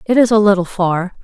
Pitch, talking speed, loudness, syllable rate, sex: 200 Hz, 245 wpm, -14 LUFS, 5.7 syllables/s, female